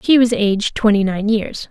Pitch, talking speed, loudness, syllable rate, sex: 215 Hz, 210 wpm, -16 LUFS, 5.1 syllables/s, female